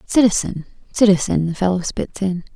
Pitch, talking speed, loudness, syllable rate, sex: 190 Hz, 115 wpm, -18 LUFS, 5.3 syllables/s, female